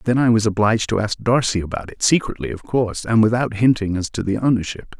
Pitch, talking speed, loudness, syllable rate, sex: 110 Hz, 230 wpm, -19 LUFS, 6.2 syllables/s, male